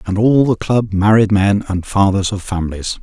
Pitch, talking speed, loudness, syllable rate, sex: 100 Hz, 200 wpm, -15 LUFS, 4.9 syllables/s, male